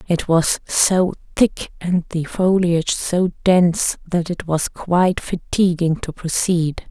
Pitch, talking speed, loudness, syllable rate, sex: 175 Hz, 140 wpm, -18 LUFS, 3.8 syllables/s, female